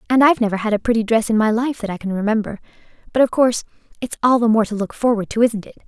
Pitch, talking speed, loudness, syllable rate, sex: 225 Hz, 265 wpm, -18 LUFS, 7.4 syllables/s, female